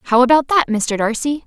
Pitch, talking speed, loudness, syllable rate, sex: 255 Hz, 205 wpm, -16 LUFS, 4.9 syllables/s, female